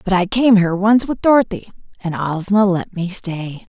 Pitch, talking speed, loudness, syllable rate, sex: 195 Hz, 190 wpm, -16 LUFS, 4.9 syllables/s, female